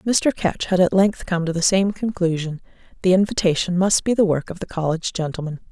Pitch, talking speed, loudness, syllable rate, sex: 180 Hz, 210 wpm, -20 LUFS, 5.6 syllables/s, female